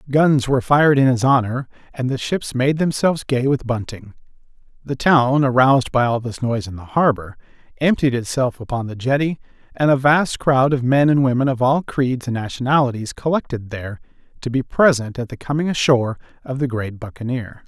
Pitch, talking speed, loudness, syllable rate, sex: 130 Hz, 185 wpm, -19 LUFS, 5.5 syllables/s, male